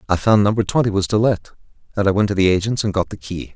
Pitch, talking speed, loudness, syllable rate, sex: 100 Hz, 285 wpm, -18 LUFS, 6.8 syllables/s, male